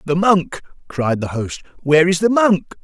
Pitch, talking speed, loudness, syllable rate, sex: 170 Hz, 190 wpm, -17 LUFS, 4.7 syllables/s, male